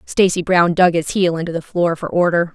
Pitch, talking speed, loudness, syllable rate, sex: 175 Hz, 235 wpm, -17 LUFS, 5.3 syllables/s, female